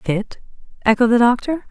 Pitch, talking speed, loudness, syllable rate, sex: 235 Hz, 140 wpm, -17 LUFS, 4.9 syllables/s, female